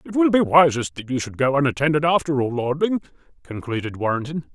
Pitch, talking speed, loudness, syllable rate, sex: 145 Hz, 185 wpm, -21 LUFS, 6.0 syllables/s, male